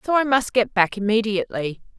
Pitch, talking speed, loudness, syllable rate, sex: 220 Hz, 180 wpm, -21 LUFS, 5.8 syllables/s, female